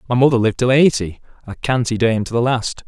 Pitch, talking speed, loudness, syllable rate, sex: 120 Hz, 230 wpm, -17 LUFS, 6.2 syllables/s, male